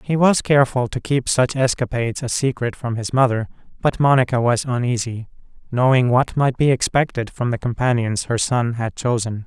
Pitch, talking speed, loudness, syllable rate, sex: 125 Hz, 180 wpm, -19 LUFS, 5.2 syllables/s, male